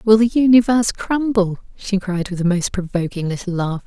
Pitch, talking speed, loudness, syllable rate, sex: 200 Hz, 185 wpm, -18 LUFS, 5.2 syllables/s, female